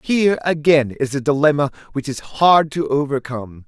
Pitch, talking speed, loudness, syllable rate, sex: 145 Hz, 165 wpm, -17 LUFS, 5.1 syllables/s, male